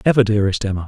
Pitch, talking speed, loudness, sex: 110 Hz, 205 wpm, -18 LUFS, male